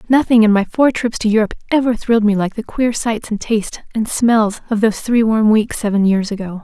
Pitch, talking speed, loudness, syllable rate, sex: 220 Hz, 235 wpm, -16 LUFS, 5.8 syllables/s, female